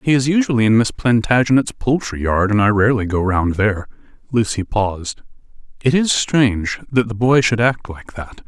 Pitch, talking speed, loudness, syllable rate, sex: 115 Hz, 185 wpm, -17 LUFS, 5.2 syllables/s, male